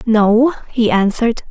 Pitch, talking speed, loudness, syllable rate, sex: 230 Hz, 120 wpm, -14 LUFS, 4.2 syllables/s, female